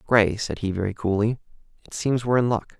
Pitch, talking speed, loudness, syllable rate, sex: 110 Hz, 215 wpm, -24 LUFS, 5.9 syllables/s, male